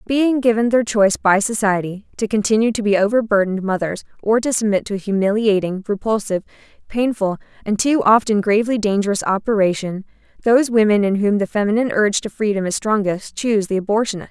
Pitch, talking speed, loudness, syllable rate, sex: 210 Hz, 165 wpm, -18 LUFS, 6.2 syllables/s, female